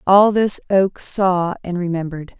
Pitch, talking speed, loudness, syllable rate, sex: 185 Hz, 150 wpm, -18 LUFS, 4.4 syllables/s, female